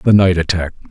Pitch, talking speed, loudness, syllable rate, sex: 90 Hz, 200 wpm, -15 LUFS, 5.6 syllables/s, male